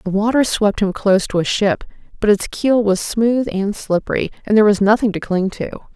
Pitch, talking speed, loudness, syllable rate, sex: 210 Hz, 220 wpm, -17 LUFS, 5.5 syllables/s, female